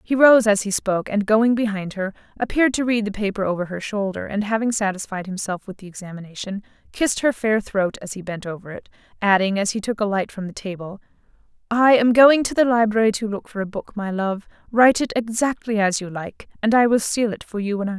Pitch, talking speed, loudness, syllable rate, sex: 210 Hz, 235 wpm, -20 LUFS, 6.0 syllables/s, female